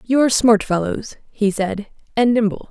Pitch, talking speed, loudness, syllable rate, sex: 220 Hz, 175 wpm, -18 LUFS, 4.9 syllables/s, female